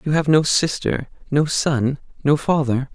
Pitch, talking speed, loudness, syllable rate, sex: 145 Hz, 120 wpm, -19 LUFS, 4.2 syllables/s, male